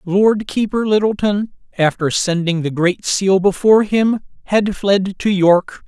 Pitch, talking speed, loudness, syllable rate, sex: 195 Hz, 145 wpm, -16 LUFS, 4.1 syllables/s, male